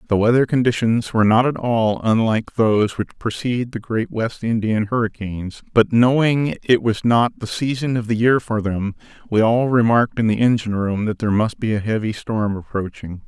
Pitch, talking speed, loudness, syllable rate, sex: 115 Hz, 195 wpm, -19 LUFS, 5.3 syllables/s, male